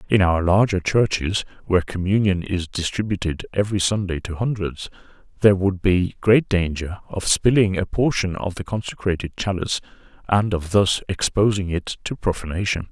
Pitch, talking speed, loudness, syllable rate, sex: 95 Hz, 150 wpm, -21 LUFS, 5.2 syllables/s, male